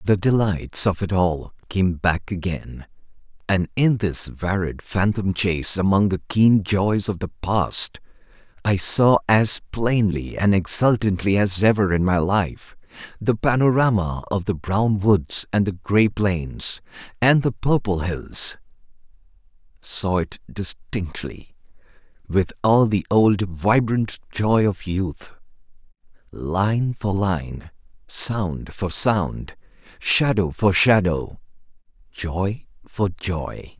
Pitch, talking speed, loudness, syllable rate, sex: 100 Hz, 120 wpm, -21 LUFS, 3.4 syllables/s, male